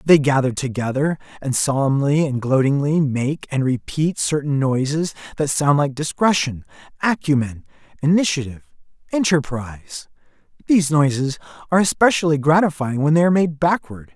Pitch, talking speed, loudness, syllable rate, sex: 145 Hz, 125 wpm, -19 LUFS, 5.2 syllables/s, male